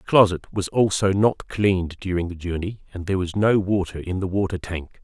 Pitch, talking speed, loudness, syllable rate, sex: 95 Hz, 215 wpm, -22 LUFS, 5.4 syllables/s, male